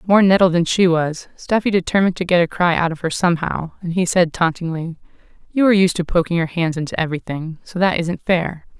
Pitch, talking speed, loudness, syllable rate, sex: 175 Hz, 225 wpm, -18 LUFS, 6.0 syllables/s, female